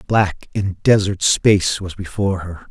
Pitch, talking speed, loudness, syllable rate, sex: 95 Hz, 155 wpm, -18 LUFS, 4.4 syllables/s, male